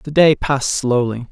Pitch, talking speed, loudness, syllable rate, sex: 135 Hz, 180 wpm, -16 LUFS, 4.8 syllables/s, male